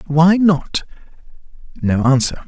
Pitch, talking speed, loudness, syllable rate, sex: 155 Hz, 95 wpm, -16 LUFS, 3.8 syllables/s, male